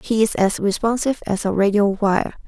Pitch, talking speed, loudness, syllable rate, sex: 210 Hz, 195 wpm, -19 LUFS, 5.4 syllables/s, female